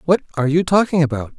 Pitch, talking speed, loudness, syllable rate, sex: 155 Hz, 215 wpm, -17 LUFS, 7.4 syllables/s, male